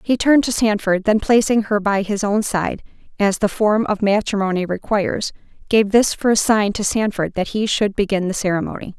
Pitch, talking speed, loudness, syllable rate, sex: 205 Hz, 195 wpm, -18 LUFS, 5.3 syllables/s, female